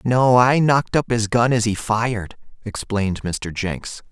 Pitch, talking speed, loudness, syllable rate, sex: 115 Hz, 175 wpm, -19 LUFS, 4.4 syllables/s, male